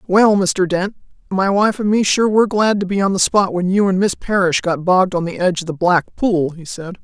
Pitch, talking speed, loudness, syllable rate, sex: 190 Hz, 265 wpm, -16 LUFS, 5.4 syllables/s, female